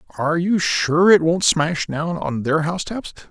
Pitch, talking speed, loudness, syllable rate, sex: 165 Hz, 180 wpm, -19 LUFS, 4.6 syllables/s, male